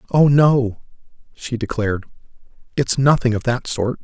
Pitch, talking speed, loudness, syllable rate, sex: 125 Hz, 135 wpm, -18 LUFS, 4.7 syllables/s, male